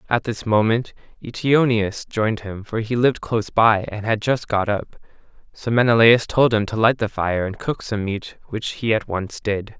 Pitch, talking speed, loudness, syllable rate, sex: 110 Hz, 200 wpm, -20 LUFS, 4.8 syllables/s, male